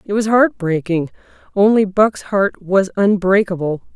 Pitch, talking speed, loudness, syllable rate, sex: 195 Hz, 120 wpm, -16 LUFS, 4.2 syllables/s, female